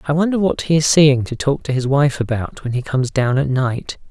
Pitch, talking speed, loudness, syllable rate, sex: 140 Hz, 265 wpm, -17 LUFS, 5.4 syllables/s, male